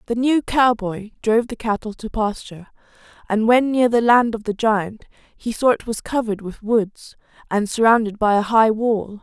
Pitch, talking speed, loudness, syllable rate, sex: 220 Hz, 190 wpm, -19 LUFS, 4.9 syllables/s, female